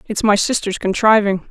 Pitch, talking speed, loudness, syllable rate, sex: 205 Hz, 160 wpm, -16 LUFS, 5.1 syllables/s, female